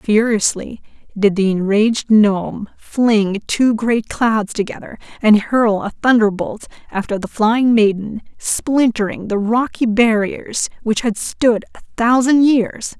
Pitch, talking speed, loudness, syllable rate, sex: 220 Hz, 130 wpm, -16 LUFS, 3.8 syllables/s, female